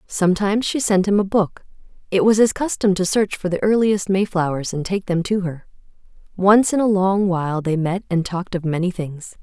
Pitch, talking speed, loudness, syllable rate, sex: 190 Hz, 210 wpm, -19 LUFS, 5.4 syllables/s, female